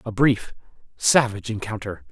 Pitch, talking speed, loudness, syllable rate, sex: 110 Hz, 115 wpm, -22 LUFS, 5.2 syllables/s, male